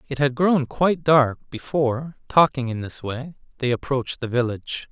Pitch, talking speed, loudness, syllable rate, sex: 135 Hz, 170 wpm, -22 LUFS, 5.1 syllables/s, male